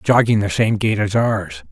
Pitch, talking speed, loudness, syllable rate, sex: 100 Hz, 210 wpm, -17 LUFS, 4.3 syllables/s, male